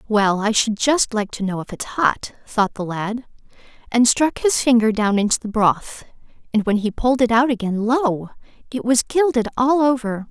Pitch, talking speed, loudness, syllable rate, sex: 230 Hz, 200 wpm, -19 LUFS, 4.7 syllables/s, female